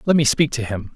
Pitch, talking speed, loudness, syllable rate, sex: 135 Hz, 315 wpm, -19 LUFS, 6.1 syllables/s, male